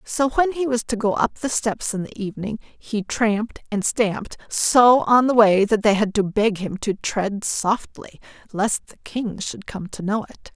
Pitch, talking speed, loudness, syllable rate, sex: 215 Hz, 210 wpm, -21 LUFS, 4.2 syllables/s, female